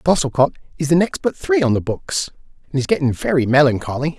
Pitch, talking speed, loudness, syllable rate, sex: 135 Hz, 200 wpm, -18 LUFS, 5.9 syllables/s, male